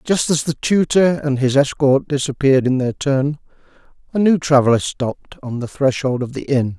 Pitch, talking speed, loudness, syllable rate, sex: 140 Hz, 185 wpm, -17 LUFS, 5.1 syllables/s, male